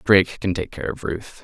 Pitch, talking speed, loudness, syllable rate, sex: 95 Hz, 250 wpm, -23 LUFS, 5.4 syllables/s, male